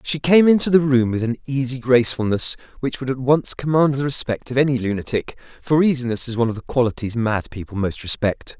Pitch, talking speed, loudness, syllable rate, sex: 130 Hz, 200 wpm, -19 LUFS, 5.9 syllables/s, male